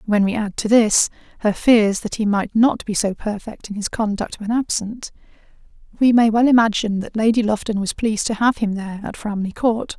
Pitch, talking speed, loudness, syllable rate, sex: 215 Hz, 210 wpm, -19 LUFS, 5.4 syllables/s, female